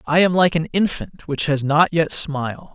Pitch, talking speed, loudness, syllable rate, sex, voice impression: 155 Hz, 220 wpm, -19 LUFS, 4.7 syllables/s, male, masculine, middle-aged, tensed, powerful, clear, intellectual, friendly, wild, lively, slightly intense